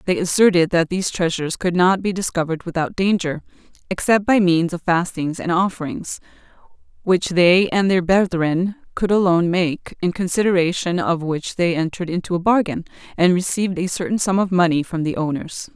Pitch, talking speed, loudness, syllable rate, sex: 180 Hz, 170 wpm, -19 LUFS, 5.5 syllables/s, female